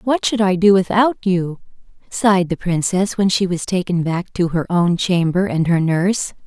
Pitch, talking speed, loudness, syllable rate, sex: 185 Hz, 195 wpm, -17 LUFS, 4.7 syllables/s, female